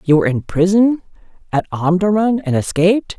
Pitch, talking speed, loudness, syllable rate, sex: 185 Hz, 150 wpm, -16 LUFS, 5.5 syllables/s, female